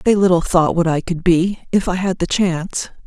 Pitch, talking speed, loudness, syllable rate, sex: 180 Hz, 235 wpm, -17 LUFS, 5.2 syllables/s, female